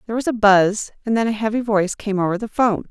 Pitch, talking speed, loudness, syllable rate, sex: 215 Hz, 270 wpm, -19 LUFS, 6.9 syllables/s, female